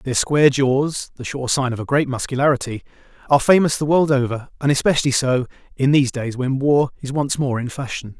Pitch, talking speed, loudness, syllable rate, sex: 135 Hz, 185 wpm, -19 LUFS, 5.6 syllables/s, male